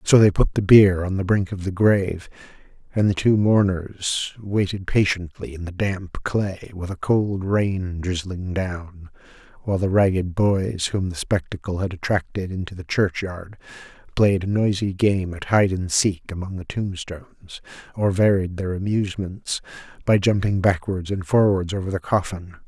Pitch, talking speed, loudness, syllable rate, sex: 95 Hz, 165 wpm, -22 LUFS, 4.5 syllables/s, male